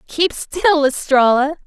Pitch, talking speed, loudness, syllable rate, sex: 295 Hz, 110 wpm, -16 LUFS, 3.5 syllables/s, female